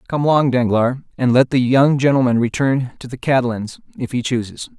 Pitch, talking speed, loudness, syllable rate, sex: 130 Hz, 190 wpm, -17 LUFS, 5.6 syllables/s, male